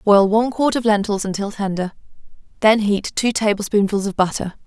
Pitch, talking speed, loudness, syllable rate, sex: 210 Hz, 165 wpm, -19 LUFS, 5.5 syllables/s, female